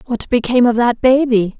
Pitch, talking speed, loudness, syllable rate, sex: 240 Hz, 190 wpm, -14 LUFS, 5.6 syllables/s, female